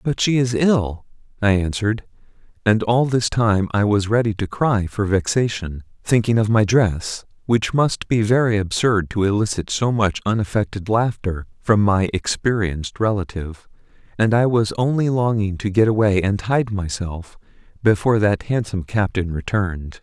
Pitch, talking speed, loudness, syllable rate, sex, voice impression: 105 Hz, 155 wpm, -19 LUFS, 4.8 syllables/s, male, masculine, adult-like, cool, sincere, calm, kind